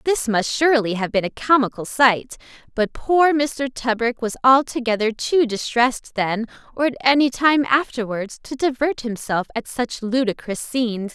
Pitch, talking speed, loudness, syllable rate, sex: 245 Hz, 155 wpm, -20 LUFS, 4.7 syllables/s, female